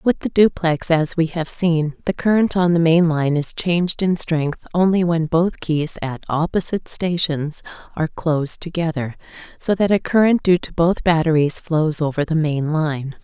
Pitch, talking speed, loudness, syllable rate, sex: 165 Hz, 180 wpm, -19 LUFS, 4.6 syllables/s, female